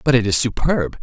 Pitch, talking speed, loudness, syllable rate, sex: 125 Hz, 235 wpm, -18 LUFS, 5.6 syllables/s, male